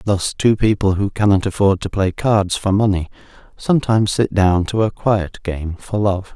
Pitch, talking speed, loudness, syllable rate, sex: 100 Hz, 190 wpm, -17 LUFS, 4.7 syllables/s, male